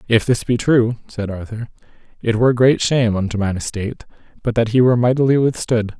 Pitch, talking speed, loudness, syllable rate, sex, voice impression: 115 Hz, 190 wpm, -17 LUFS, 6.0 syllables/s, male, very masculine, adult-like, slightly thick, cool, sincere, slightly calm, slightly sweet